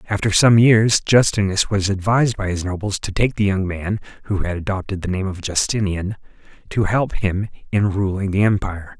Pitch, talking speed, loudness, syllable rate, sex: 100 Hz, 185 wpm, -19 LUFS, 5.3 syllables/s, male